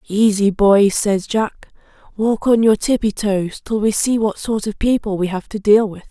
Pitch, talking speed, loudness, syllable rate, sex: 210 Hz, 205 wpm, -17 LUFS, 4.4 syllables/s, female